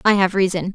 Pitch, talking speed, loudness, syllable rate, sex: 190 Hz, 240 wpm, -18 LUFS, 6.2 syllables/s, female